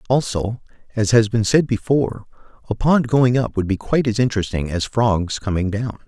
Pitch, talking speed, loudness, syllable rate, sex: 115 Hz, 190 wpm, -19 LUFS, 5.3 syllables/s, male